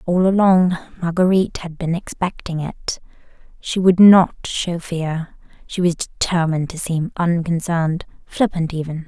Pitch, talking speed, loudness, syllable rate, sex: 170 Hz, 130 wpm, -19 LUFS, 4.5 syllables/s, female